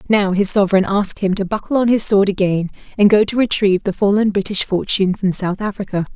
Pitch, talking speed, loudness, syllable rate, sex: 200 Hz, 215 wpm, -16 LUFS, 6.2 syllables/s, female